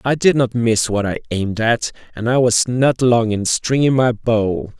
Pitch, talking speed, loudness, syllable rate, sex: 120 Hz, 215 wpm, -17 LUFS, 4.4 syllables/s, male